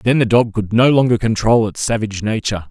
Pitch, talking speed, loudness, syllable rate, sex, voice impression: 110 Hz, 220 wpm, -16 LUFS, 6.0 syllables/s, male, very masculine, very middle-aged, very thick, tensed, powerful, slightly bright, slightly soft, slightly muffled, fluent, very cool, very intellectual, slightly refreshing, very sincere, very calm, very mature, very friendly, very reassuring, very unique, elegant, wild, slightly sweet, lively, kind, slightly intense